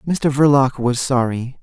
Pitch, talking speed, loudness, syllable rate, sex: 135 Hz, 145 wpm, -17 LUFS, 4.1 syllables/s, male